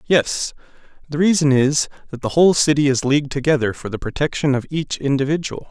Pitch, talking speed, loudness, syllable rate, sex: 140 Hz, 180 wpm, -18 LUFS, 5.9 syllables/s, male